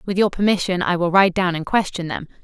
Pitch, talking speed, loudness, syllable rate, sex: 185 Hz, 245 wpm, -19 LUFS, 6.0 syllables/s, female